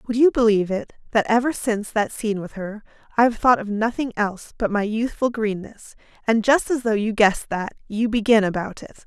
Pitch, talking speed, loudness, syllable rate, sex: 220 Hz, 210 wpm, -21 LUFS, 5.8 syllables/s, female